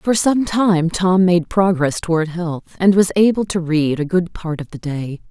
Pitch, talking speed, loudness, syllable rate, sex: 175 Hz, 215 wpm, -17 LUFS, 4.3 syllables/s, female